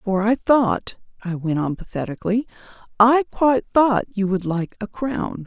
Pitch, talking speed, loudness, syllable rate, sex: 215 Hz, 165 wpm, -20 LUFS, 4.6 syllables/s, female